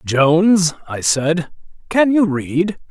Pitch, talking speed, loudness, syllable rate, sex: 170 Hz, 125 wpm, -16 LUFS, 3.2 syllables/s, male